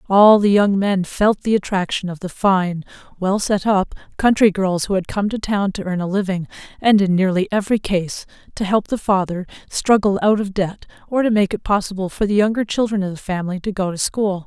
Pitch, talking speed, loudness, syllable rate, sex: 195 Hz, 215 wpm, -18 LUFS, 5.4 syllables/s, female